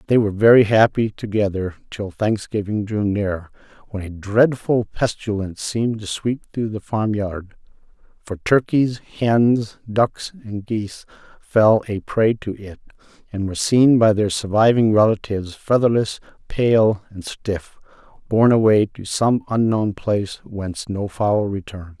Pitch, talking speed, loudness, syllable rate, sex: 105 Hz, 140 wpm, -19 LUFS, 4.5 syllables/s, male